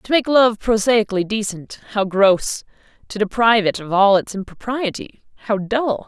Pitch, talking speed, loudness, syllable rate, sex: 215 Hz, 150 wpm, -18 LUFS, 4.7 syllables/s, female